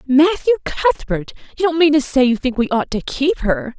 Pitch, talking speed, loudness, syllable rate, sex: 270 Hz, 220 wpm, -17 LUFS, 5.0 syllables/s, female